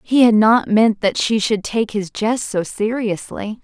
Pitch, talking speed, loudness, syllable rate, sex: 215 Hz, 200 wpm, -17 LUFS, 4.0 syllables/s, female